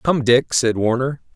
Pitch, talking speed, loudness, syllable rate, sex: 125 Hz, 180 wpm, -18 LUFS, 4.1 syllables/s, male